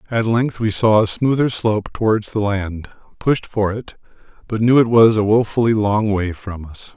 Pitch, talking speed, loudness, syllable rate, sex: 105 Hz, 200 wpm, -17 LUFS, 4.7 syllables/s, male